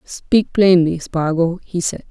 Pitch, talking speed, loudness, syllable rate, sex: 175 Hz, 145 wpm, -17 LUFS, 3.6 syllables/s, female